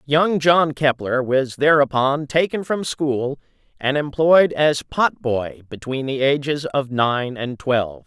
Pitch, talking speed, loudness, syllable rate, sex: 140 Hz, 150 wpm, -19 LUFS, 3.7 syllables/s, male